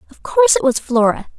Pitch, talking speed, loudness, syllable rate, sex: 315 Hz, 215 wpm, -15 LUFS, 6.4 syllables/s, female